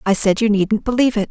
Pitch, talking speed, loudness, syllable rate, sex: 215 Hz, 320 wpm, -17 LUFS, 7.6 syllables/s, female